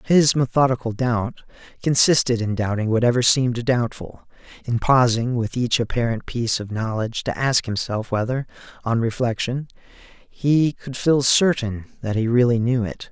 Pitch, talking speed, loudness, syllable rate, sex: 120 Hz, 145 wpm, -21 LUFS, 4.8 syllables/s, male